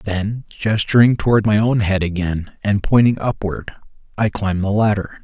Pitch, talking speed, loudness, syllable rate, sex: 105 Hz, 160 wpm, -18 LUFS, 4.9 syllables/s, male